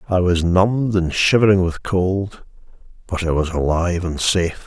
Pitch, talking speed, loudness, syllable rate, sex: 90 Hz, 155 wpm, -18 LUFS, 4.9 syllables/s, male